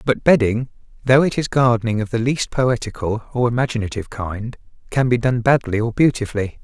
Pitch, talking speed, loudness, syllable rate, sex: 120 Hz, 170 wpm, -19 LUFS, 5.7 syllables/s, male